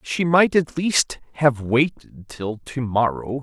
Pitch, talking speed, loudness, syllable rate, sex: 130 Hz, 160 wpm, -21 LUFS, 3.5 syllables/s, male